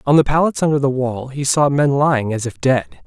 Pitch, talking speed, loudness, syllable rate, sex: 140 Hz, 255 wpm, -17 LUFS, 5.7 syllables/s, male